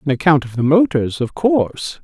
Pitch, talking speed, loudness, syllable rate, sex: 145 Hz, 205 wpm, -16 LUFS, 5.3 syllables/s, male